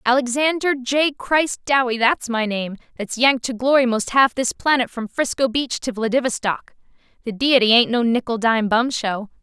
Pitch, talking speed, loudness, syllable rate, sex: 245 Hz, 170 wpm, -19 LUFS, 4.9 syllables/s, female